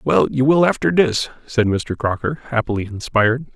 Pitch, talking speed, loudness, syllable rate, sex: 125 Hz, 170 wpm, -18 LUFS, 5.1 syllables/s, male